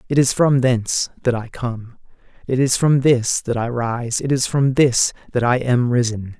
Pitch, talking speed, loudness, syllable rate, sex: 125 Hz, 205 wpm, -18 LUFS, 4.5 syllables/s, male